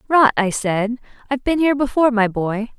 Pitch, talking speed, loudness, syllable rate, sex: 240 Hz, 195 wpm, -18 LUFS, 5.8 syllables/s, female